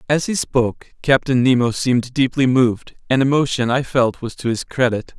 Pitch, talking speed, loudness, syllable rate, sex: 125 Hz, 185 wpm, -18 LUFS, 5.2 syllables/s, male